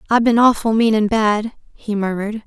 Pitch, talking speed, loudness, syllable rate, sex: 220 Hz, 195 wpm, -17 LUFS, 5.4 syllables/s, female